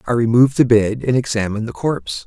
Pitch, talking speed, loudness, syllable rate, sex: 115 Hz, 210 wpm, -17 LUFS, 6.6 syllables/s, male